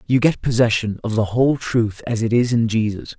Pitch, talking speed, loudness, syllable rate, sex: 115 Hz, 225 wpm, -19 LUFS, 5.4 syllables/s, male